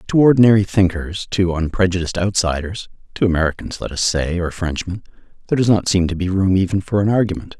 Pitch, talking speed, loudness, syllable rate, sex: 95 Hz, 175 wpm, -18 LUFS, 6.2 syllables/s, male